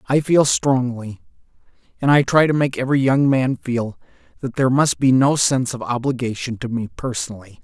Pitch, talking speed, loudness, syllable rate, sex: 130 Hz, 180 wpm, -18 LUFS, 5.5 syllables/s, male